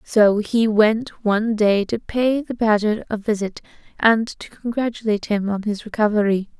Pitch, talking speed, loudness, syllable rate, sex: 215 Hz, 165 wpm, -20 LUFS, 4.7 syllables/s, female